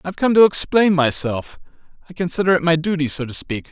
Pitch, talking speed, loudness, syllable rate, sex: 165 Hz, 210 wpm, -17 LUFS, 6.2 syllables/s, male